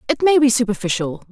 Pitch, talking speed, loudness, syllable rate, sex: 230 Hz, 185 wpm, -17 LUFS, 6.5 syllables/s, female